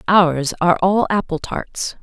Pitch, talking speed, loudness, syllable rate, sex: 180 Hz, 150 wpm, -18 LUFS, 4.0 syllables/s, female